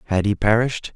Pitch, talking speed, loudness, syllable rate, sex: 110 Hz, 190 wpm, -20 LUFS, 6.9 syllables/s, male